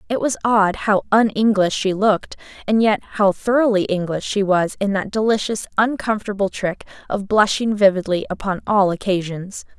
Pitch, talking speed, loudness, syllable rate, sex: 205 Hz, 160 wpm, -19 LUFS, 5.1 syllables/s, female